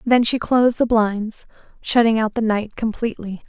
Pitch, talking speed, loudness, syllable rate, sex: 225 Hz, 170 wpm, -19 LUFS, 5.1 syllables/s, female